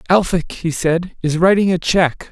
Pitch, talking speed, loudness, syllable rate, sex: 175 Hz, 180 wpm, -16 LUFS, 4.8 syllables/s, male